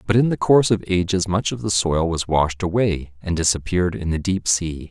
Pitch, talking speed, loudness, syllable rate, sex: 90 Hz, 235 wpm, -20 LUFS, 5.3 syllables/s, male